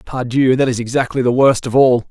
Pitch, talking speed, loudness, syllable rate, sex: 125 Hz, 230 wpm, -15 LUFS, 5.6 syllables/s, male